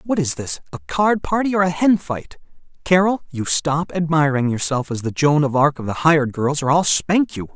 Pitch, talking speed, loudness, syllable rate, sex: 155 Hz, 220 wpm, -19 LUFS, 5.0 syllables/s, male